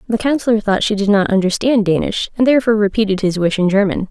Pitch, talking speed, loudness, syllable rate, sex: 205 Hz, 220 wpm, -15 LUFS, 6.7 syllables/s, female